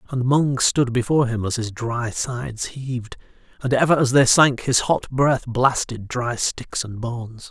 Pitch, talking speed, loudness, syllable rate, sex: 125 Hz, 185 wpm, -21 LUFS, 4.3 syllables/s, male